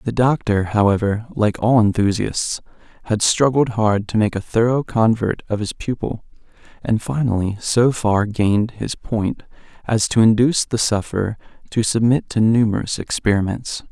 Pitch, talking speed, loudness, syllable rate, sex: 110 Hz, 145 wpm, -19 LUFS, 4.7 syllables/s, male